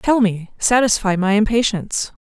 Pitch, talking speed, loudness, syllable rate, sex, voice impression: 215 Hz, 135 wpm, -17 LUFS, 4.8 syllables/s, female, feminine, adult-like, relaxed, clear, fluent, intellectual, calm, friendly, lively, slightly sharp